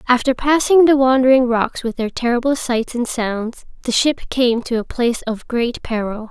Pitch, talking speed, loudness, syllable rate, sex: 245 Hz, 190 wpm, -17 LUFS, 4.8 syllables/s, female